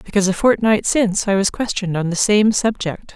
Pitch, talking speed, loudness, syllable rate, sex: 205 Hz, 210 wpm, -17 LUFS, 5.9 syllables/s, female